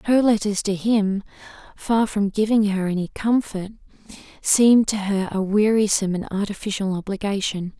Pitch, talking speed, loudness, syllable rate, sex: 205 Hz, 140 wpm, -21 LUFS, 5.1 syllables/s, female